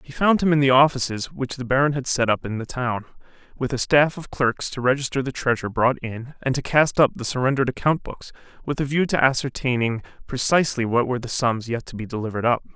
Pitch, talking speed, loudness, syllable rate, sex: 130 Hz, 230 wpm, -22 LUFS, 6.1 syllables/s, male